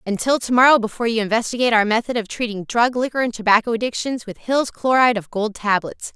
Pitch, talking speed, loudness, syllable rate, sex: 230 Hz, 195 wpm, -19 LUFS, 6.5 syllables/s, female